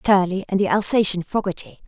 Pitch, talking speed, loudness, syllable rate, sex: 185 Hz, 160 wpm, -19 LUFS, 5.8 syllables/s, female